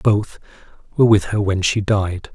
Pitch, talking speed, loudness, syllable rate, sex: 100 Hz, 180 wpm, -18 LUFS, 4.6 syllables/s, male